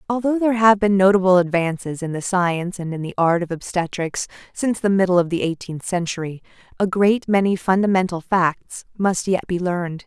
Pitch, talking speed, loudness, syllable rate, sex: 185 Hz, 185 wpm, -20 LUFS, 5.5 syllables/s, female